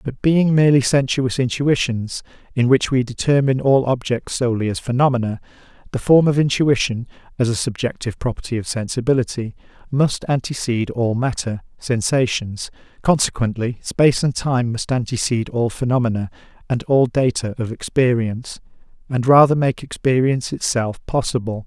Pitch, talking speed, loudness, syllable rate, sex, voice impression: 125 Hz, 135 wpm, -19 LUFS, 4.7 syllables/s, male, masculine, adult-like, thin, relaxed, slightly soft, fluent, slightly raspy, slightly intellectual, refreshing, sincere, friendly, kind, slightly modest